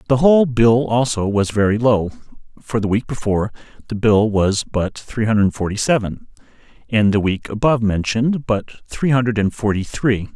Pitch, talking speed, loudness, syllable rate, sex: 110 Hz, 170 wpm, -18 LUFS, 5.1 syllables/s, male